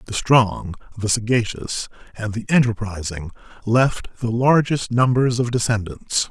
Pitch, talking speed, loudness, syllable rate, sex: 115 Hz, 125 wpm, -20 LUFS, 4.3 syllables/s, male